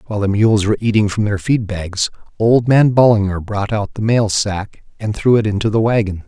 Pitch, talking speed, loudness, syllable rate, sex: 105 Hz, 220 wpm, -16 LUFS, 5.3 syllables/s, male